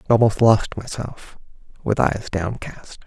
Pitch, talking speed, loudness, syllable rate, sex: 110 Hz, 135 wpm, -20 LUFS, 4.2 syllables/s, male